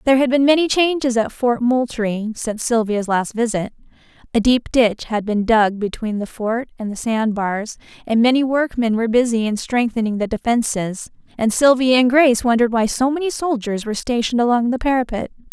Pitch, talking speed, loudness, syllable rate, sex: 235 Hz, 185 wpm, -18 LUFS, 5.5 syllables/s, female